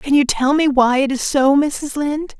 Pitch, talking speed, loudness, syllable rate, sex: 280 Hz, 250 wpm, -16 LUFS, 4.7 syllables/s, female